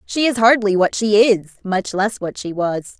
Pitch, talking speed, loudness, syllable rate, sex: 205 Hz, 220 wpm, -17 LUFS, 4.3 syllables/s, female